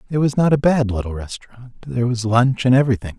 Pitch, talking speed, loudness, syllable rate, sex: 120 Hz, 225 wpm, -18 LUFS, 6.5 syllables/s, male